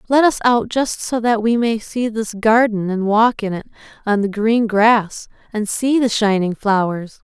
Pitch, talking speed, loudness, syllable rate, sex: 220 Hz, 195 wpm, -17 LUFS, 4.2 syllables/s, female